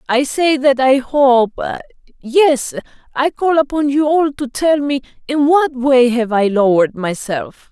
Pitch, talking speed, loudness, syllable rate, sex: 265 Hz, 165 wpm, -15 LUFS, 4.3 syllables/s, female